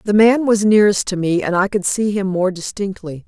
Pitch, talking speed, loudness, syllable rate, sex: 195 Hz, 240 wpm, -16 LUFS, 5.4 syllables/s, female